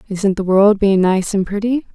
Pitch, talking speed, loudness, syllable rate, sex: 200 Hz, 215 wpm, -15 LUFS, 4.6 syllables/s, female